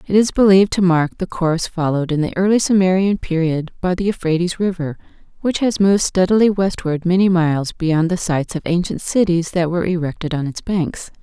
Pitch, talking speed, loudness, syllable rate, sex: 175 Hz, 190 wpm, -17 LUFS, 5.8 syllables/s, female